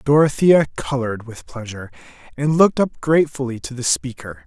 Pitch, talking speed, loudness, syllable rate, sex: 135 Hz, 150 wpm, -18 LUFS, 5.8 syllables/s, male